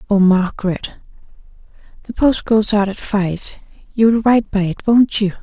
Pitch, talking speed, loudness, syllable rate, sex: 205 Hz, 155 wpm, -16 LUFS, 4.9 syllables/s, female